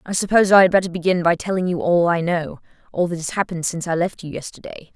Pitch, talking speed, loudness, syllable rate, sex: 175 Hz, 240 wpm, -19 LUFS, 6.8 syllables/s, female